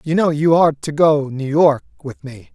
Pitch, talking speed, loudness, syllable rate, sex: 150 Hz, 235 wpm, -16 LUFS, 4.8 syllables/s, male